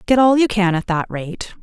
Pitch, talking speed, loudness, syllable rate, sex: 205 Hz, 260 wpm, -17 LUFS, 4.9 syllables/s, female